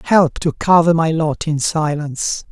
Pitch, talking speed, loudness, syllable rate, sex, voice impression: 160 Hz, 165 wpm, -16 LUFS, 4.2 syllables/s, male, masculine, middle-aged, slightly sincere, slightly friendly, slightly unique